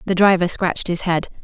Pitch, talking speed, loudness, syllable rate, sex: 180 Hz, 210 wpm, -18 LUFS, 5.8 syllables/s, female